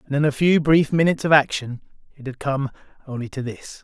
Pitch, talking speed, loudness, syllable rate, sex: 140 Hz, 220 wpm, -20 LUFS, 5.9 syllables/s, male